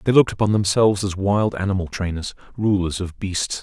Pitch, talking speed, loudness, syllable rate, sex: 100 Hz, 180 wpm, -21 LUFS, 5.8 syllables/s, male